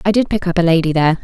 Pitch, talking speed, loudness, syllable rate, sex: 175 Hz, 340 wpm, -15 LUFS, 8.0 syllables/s, female